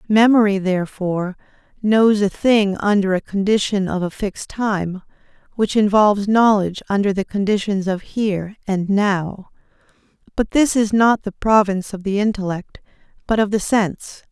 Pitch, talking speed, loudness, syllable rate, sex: 200 Hz, 145 wpm, -18 LUFS, 4.9 syllables/s, female